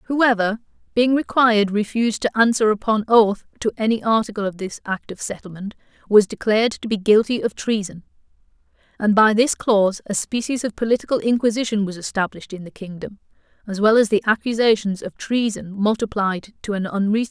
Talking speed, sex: 170 wpm, female